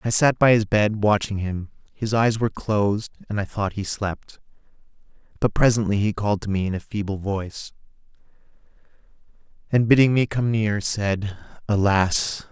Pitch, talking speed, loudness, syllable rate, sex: 105 Hz, 160 wpm, -22 LUFS, 4.9 syllables/s, male